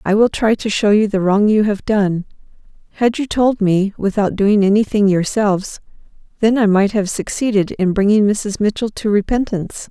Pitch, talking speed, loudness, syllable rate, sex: 205 Hz, 175 wpm, -16 LUFS, 5.0 syllables/s, female